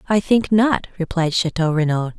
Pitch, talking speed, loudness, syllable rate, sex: 180 Hz, 165 wpm, -18 LUFS, 4.9 syllables/s, female